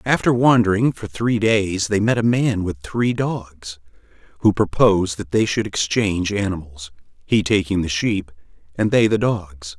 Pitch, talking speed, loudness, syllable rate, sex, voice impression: 100 Hz, 165 wpm, -19 LUFS, 4.4 syllables/s, male, very masculine, very adult-like, middle-aged, thick, tensed, powerful, bright, slightly soft, clear, fluent, slightly raspy, very cool, very intellectual, refreshing, very sincere, very calm, mature, very friendly, very reassuring, unique, elegant, wild, sweet, lively, kind